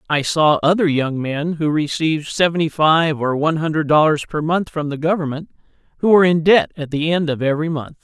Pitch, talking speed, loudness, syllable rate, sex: 155 Hz, 210 wpm, -17 LUFS, 5.7 syllables/s, male